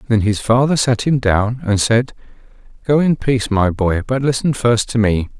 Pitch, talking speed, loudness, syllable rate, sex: 120 Hz, 200 wpm, -16 LUFS, 4.9 syllables/s, male